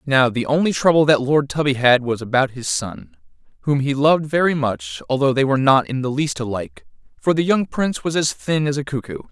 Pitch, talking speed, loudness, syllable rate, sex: 140 Hz, 225 wpm, -19 LUFS, 5.7 syllables/s, male